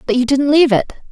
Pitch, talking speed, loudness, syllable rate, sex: 265 Hz, 270 wpm, -14 LUFS, 7.4 syllables/s, female